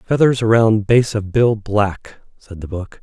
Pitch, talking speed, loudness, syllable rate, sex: 105 Hz, 180 wpm, -16 LUFS, 3.9 syllables/s, male